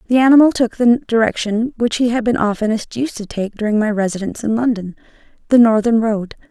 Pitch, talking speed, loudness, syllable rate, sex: 225 Hz, 185 wpm, -16 LUFS, 5.9 syllables/s, female